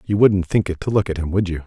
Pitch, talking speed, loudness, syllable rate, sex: 95 Hz, 360 wpm, -19 LUFS, 6.4 syllables/s, male